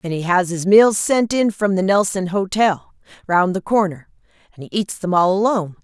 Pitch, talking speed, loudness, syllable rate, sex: 195 Hz, 195 wpm, -17 LUFS, 4.9 syllables/s, female